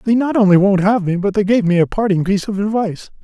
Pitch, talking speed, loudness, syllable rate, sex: 200 Hz, 280 wpm, -15 LUFS, 6.6 syllables/s, male